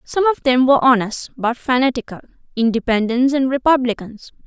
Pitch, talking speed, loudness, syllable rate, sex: 250 Hz, 135 wpm, -17 LUFS, 5.5 syllables/s, female